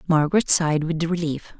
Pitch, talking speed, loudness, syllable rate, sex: 160 Hz, 150 wpm, -21 LUFS, 5.6 syllables/s, female